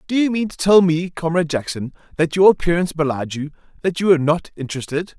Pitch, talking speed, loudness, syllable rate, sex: 165 Hz, 210 wpm, -19 LUFS, 6.6 syllables/s, male